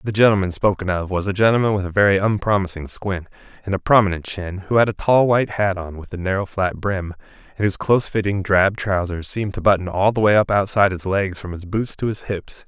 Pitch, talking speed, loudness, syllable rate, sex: 100 Hz, 235 wpm, -19 LUFS, 6.1 syllables/s, male